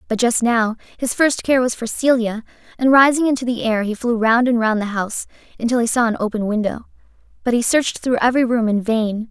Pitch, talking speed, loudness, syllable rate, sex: 235 Hz, 225 wpm, -18 LUFS, 5.8 syllables/s, female